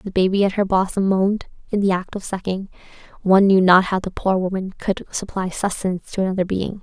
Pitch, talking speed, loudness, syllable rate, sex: 190 Hz, 210 wpm, -20 LUFS, 6.0 syllables/s, female